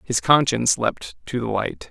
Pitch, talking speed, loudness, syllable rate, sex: 120 Hz, 190 wpm, -21 LUFS, 4.7 syllables/s, male